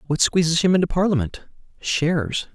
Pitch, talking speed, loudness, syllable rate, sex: 160 Hz, 140 wpm, -20 LUFS, 5.5 syllables/s, male